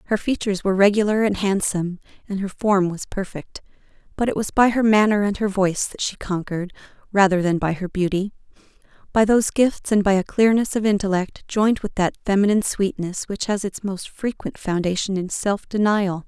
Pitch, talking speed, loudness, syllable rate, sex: 200 Hz, 185 wpm, -21 LUFS, 5.7 syllables/s, female